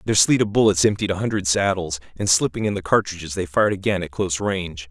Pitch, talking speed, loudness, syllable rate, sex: 95 Hz, 230 wpm, -21 LUFS, 6.5 syllables/s, male